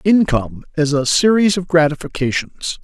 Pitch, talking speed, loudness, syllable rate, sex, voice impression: 160 Hz, 125 wpm, -16 LUFS, 4.9 syllables/s, male, masculine, very adult-like, slightly muffled, fluent, slightly refreshing, sincere, slightly elegant